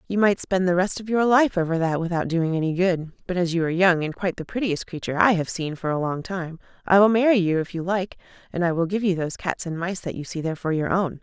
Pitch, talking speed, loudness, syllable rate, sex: 175 Hz, 290 wpm, -23 LUFS, 6.3 syllables/s, female